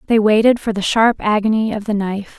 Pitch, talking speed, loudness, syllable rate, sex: 215 Hz, 225 wpm, -16 LUFS, 5.9 syllables/s, female